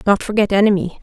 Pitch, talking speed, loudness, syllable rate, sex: 200 Hz, 175 wpm, -16 LUFS, 6.8 syllables/s, female